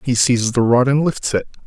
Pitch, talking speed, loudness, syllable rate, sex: 125 Hz, 255 wpm, -16 LUFS, 5.8 syllables/s, male